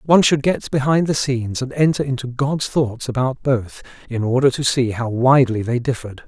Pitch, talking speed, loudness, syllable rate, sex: 130 Hz, 200 wpm, -19 LUFS, 5.5 syllables/s, male